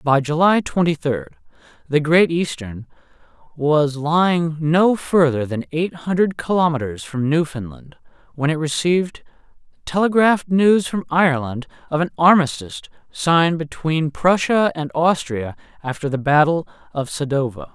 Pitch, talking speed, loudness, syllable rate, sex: 155 Hz, 125 wpm, -19 LUFS, 4.6 syllables/s, male